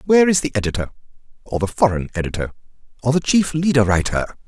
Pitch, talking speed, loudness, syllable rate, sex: 125 Hz, 175 wpm, -19 LUFS, 6.6 syllables/s, male